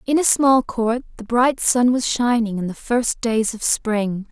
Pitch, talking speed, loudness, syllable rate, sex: 235 Hz, 210 wpm, -19 LUFS, 3.9 syllables/s, female